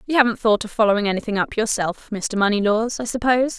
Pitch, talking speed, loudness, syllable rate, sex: 220 Hz, 200 wpm, -20 LUFS, 6.4 syllables/s, female